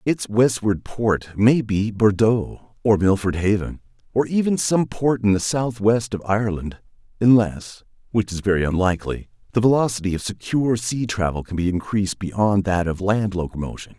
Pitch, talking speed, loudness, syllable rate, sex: 105 Hz, 155 wpm, -21 LUFS, 4.9 syllables/s, male